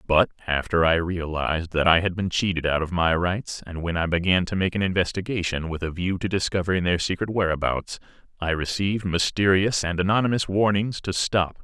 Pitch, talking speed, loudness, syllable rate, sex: 90 Hz, 190 wpm, -23 LUFS, 5.6 syllables/s, male